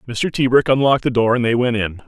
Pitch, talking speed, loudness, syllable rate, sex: 120 Hz, 260 wpm, -17 LUFS, 6.4 syllables/s, male